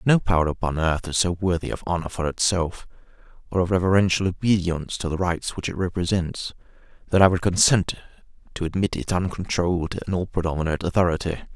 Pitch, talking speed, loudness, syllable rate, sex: 90 Hz, 175 wpm, -23 LUFS, 6.2 syllables/s, male